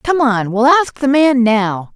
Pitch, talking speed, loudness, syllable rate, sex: 250 Hz, 215 wpm, -13 LUFS, 3.7 syllables/s, female